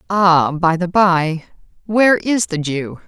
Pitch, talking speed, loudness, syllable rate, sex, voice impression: 180 Hz, 155 wpm, -16 LUFS, 3.7 syllables/s, female, feminine, middle-aged, tensed, powerful, clear, slightly fluent, intellectual, calm, elegant, lively, slightly sharp